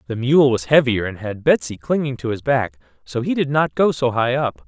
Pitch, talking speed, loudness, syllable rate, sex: 125 Hz, 245 wpm, -19 LUFS, 5.2 syllables/s, male